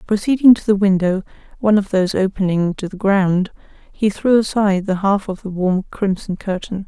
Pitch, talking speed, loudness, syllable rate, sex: 195 Hz, 185 wpm, -17 LUFS, 5.3 syllables/s, female